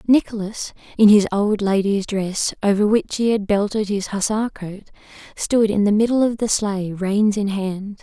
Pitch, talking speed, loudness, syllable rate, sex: 205 Hz, 180 wpm, -19 LUFS, 4.7 syllables/s, female